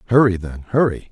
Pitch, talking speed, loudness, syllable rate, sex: 105 Hz, 160 wpm, -18 LUFS, 5.7 syllables/s, male